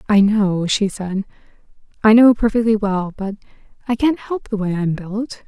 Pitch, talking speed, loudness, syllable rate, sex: 210 Hz, 165 wpm, -18 LUFS, 4.6 syllables/s, female